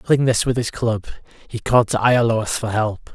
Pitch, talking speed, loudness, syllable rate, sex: 115 Hz, 210 wpm, -19 LUFS, 5.6 syllables/s, male